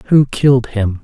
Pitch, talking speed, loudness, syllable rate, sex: 120 Hz, 175 wpm, -14 LUFS, 4.0 syllables/s, male